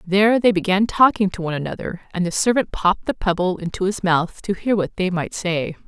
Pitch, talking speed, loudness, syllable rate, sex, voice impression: 190 Hz, 225 wpm, -20 LUFS, 5.7 syllables/s, female, feminine, adult-like, thick, tensed, slightly powerful, hard, clear, intellectual, calm, friendly, reassuring, elegant, lively, slightly strict